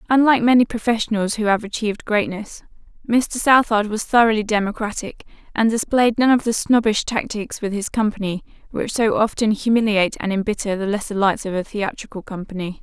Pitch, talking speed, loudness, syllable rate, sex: 215 Hz, 165 wpm, -19 LUFS, 5.7 syllables/s, female